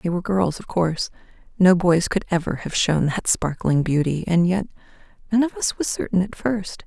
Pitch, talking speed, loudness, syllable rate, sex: 185 Hz, 200 wpm, -21 LUFS, 5.1 syllables/s, female